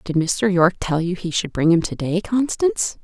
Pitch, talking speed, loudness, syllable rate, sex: 180 Hz, 235 wpm, -20 LUFS, 5.2 syllables/s, female